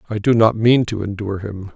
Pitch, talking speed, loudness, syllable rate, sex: 105 Hz, 240 wpm, -17 LUFS, 5.8 syllables/s, male